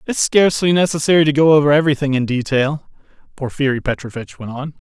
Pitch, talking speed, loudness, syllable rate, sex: 145 Hz, 160 wpm, -16 LUFS, 6.5 syllables/s, male